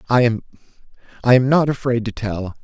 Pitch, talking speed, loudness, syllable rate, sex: 120 Hz, 160 wpm, -18 LUFS, 5.6 syllables/s, male